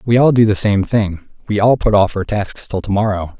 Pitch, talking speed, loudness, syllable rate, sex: 105 Hz, 245 wpm, -15 LUFS, 5.2 syllables/s, male